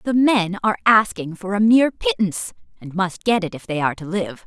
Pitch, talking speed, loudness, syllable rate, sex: 195 Hz, 230 wpm, -19 LUFS, 5.8 syllables/s, female